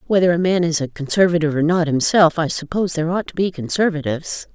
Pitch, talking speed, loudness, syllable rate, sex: 165 Hz, 210 wpm, -18 LUFS, 6.7 syllables/s, female